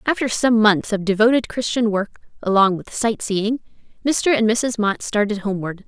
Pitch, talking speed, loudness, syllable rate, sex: 220 Hz, 175 wpm, -19 LUFS, 5.1 syllables/s, female